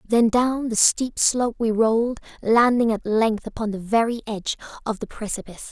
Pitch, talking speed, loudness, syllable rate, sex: 225 Hz, 180 wpm, -22 LUFS, 5.2 syllables/s, female